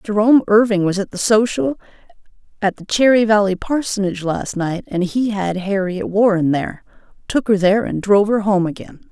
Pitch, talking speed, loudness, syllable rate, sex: 205 Hz, 170 wpm, -17 LUFS, 5.5 syllables/s, female